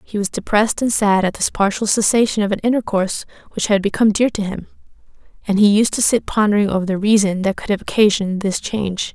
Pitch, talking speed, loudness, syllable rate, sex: 205 Hz, 215 wpm, -17 LUFS, 6.4 syllables/s, female